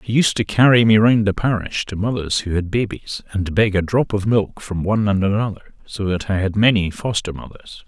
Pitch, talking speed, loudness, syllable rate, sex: 100 Hz, 230 wpm, -18 LUFS, 5.4 syllables/s, male